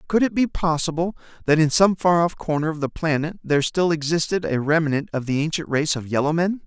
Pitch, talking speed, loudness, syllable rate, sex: 160 Hz, 225 wpm, -21 LUFS, 5.7 syllables/s, male